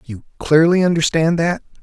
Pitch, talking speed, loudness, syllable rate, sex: 160 Hz, 130 wpm, -16 LUFS, 4.9 syllables/s, male